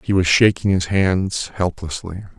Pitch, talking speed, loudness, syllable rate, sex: 90 Hz, 150 wpm, -18 LUFS, 4.3 syllables/s, male